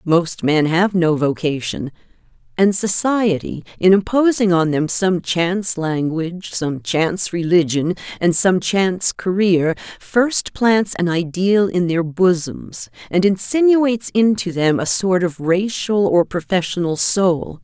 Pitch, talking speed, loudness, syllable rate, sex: 180 Hz, 135 wpm, -17 LUFS, 3.9 syllables/s, female